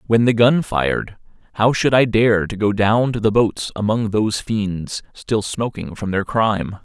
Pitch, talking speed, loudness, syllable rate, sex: 110 Hz, 195 wpm, -18 LUFS, 4.4 syllables/s, male